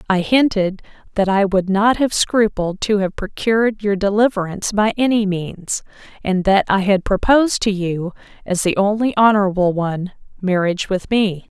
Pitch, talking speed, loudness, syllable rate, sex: 200 Hz, 160 wpm, -17 LUFS, 4.9 syllables/s, female